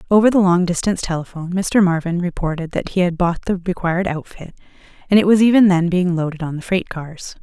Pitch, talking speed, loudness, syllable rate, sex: 180 Hz, 210 wpm, -18 LUFS, 6.1 syllables/s, female